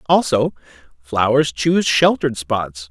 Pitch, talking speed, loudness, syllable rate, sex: 125 Hz, 105 wpm, -17 LUFS, 4.5 syllables/s, male